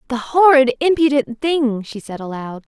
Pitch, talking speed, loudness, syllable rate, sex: 260 Hz, 150 wpm, -16 LUFS, 4.6 syllables/s, female